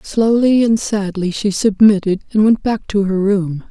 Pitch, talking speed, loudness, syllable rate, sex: 205 Hz, 180 wpm, -15 LUFS, 4.4 syllables/s, female